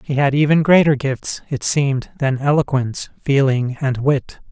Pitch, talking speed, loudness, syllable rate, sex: 140 Hz, 160 wpm, -18 LUFS, 4.6 syllables/s, male